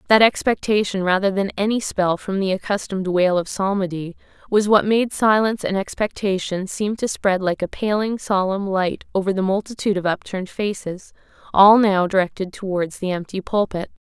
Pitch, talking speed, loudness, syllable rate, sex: 195 Hz, 165 wpm, -20 LUFS, 5.3 syllables/s, female